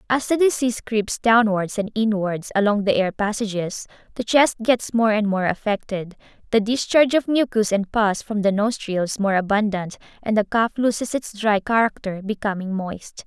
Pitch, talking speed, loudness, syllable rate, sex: 215 Hz, 170 wpm, -21 LUFS, 4.9 syllables/s, female